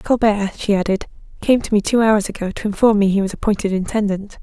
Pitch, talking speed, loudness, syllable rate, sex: 205 Hz, 215 wpm, -18 LUFS, 5.9 syllables/s, female